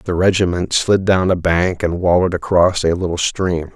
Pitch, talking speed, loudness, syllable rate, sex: 90 Hz, 190 wpm, -16 LUFS, 4.9 syllables/s, male